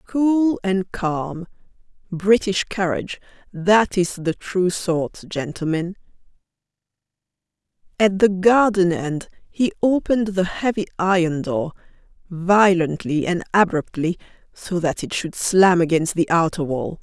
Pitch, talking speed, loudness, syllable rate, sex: 185 Hz, 115 wpm, -20 LUFS, 4.0 syllables/s, female